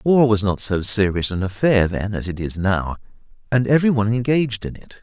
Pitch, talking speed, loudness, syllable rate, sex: 105 Hz, 205 wpm, -19 LUFS, 5.5 syllables/s, male